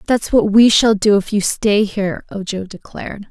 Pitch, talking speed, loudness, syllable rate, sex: 205 Hz, 200 wpm, -15 LUFS, 4.9 syllables/s, female